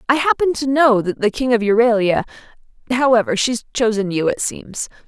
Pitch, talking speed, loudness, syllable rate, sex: 230 Hz, 165 wpm, -17 LUFS, 5.3 syllables/s, female